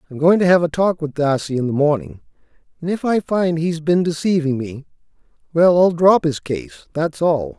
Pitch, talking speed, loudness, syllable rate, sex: 165 Hz, 205 wpm, -18 LUFS, 5.1 syllables/s, male